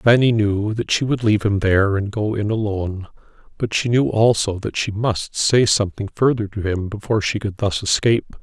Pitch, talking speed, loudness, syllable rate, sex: 105 Hz, 205 wpm, -19 LUFS, 5.5 syllables/s, male